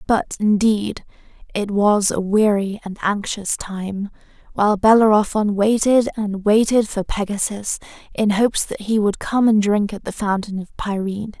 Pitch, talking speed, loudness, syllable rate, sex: 205 Hz, 155 wpm, -19 LUFS, 4.5 syllables/s, female